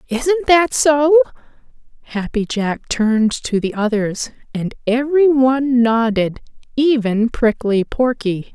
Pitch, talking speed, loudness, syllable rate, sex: 245 Hz, 110 wpm, -17 LUFS, 3.9 syllables/s, female